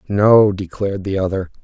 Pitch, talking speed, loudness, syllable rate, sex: 100 Hz, 145 wpm, -16 LUFS, 5.2 syllables/s, male